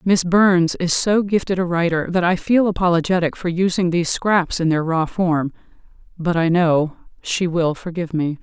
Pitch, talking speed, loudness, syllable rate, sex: 175 Hz, 185 wpm, -18 LUFS, 4.9 syllables/s, female